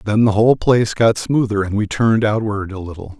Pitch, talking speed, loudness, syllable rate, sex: 105 Hz, 225 wpm, -16 LUFS, 5.9 syllables/s, male